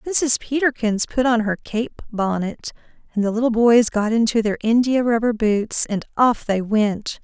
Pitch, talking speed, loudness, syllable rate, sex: 225 Hz, 175 wpm, -19 LUFS, 4.3 syllables/s, female